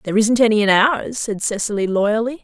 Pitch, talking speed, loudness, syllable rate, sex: 220 Hz, 195 wpm, -17 LUFS, 5.6 syllables/s, female